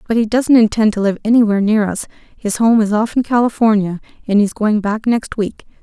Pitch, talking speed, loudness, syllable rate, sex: 215 Hz, 215 wpm, -15 LUFS, 5.7 syllables/s, female